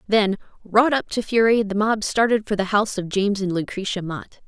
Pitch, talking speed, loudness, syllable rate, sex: 205 Hz, 215 wpm, -21 LUFS, 5.6 syllables/s, female